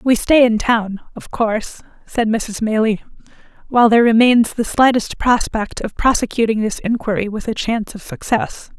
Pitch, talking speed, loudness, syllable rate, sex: 225 Hz, 165 wpm, -16 LUFS, 5.0 syllables/s, female